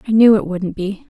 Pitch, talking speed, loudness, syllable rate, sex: 205 Hz, 255 wpm, -16 LUFS, 5.5 syllables/s, female